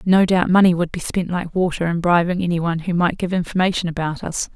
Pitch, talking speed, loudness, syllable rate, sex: 175 Hz, 235 wpm, -19 LUFS, 6.1 syllables/s, female